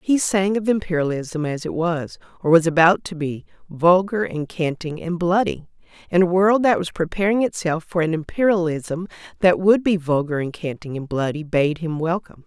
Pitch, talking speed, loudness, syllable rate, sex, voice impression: 170 Hz, 175 wpm, -20 LUFS, 5.1 syllables/s, female, feminine, slightly middle-aged, slightly powerful, clear, slightly sharp